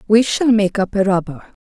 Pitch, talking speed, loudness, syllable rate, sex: 200 Hz, 220 wpm, -16 LUFS, 5.0 syllables/s, female